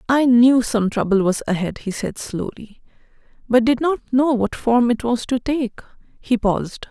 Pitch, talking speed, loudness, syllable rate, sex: 240 Hz, 180 wpm, -19 LUFS, 4.5 syllables/s, female